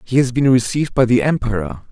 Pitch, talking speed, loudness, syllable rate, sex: 125 Hz, 220 wpm, -16 LUFS, 6.3 syllables/s, male